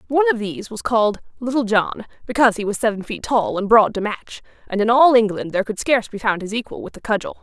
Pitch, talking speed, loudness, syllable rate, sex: 225 Hz, 250 wpm, -19 LUFS, 6.7 syllables/s, female